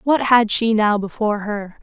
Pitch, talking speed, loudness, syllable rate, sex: 220 Hz, 195 wpm, -18 LUFS, 4.7 syllables/s, female